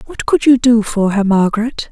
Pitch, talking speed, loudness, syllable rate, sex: 230 Hz, 220 wpm, -13 LUFS, 5.1 syllables/s, female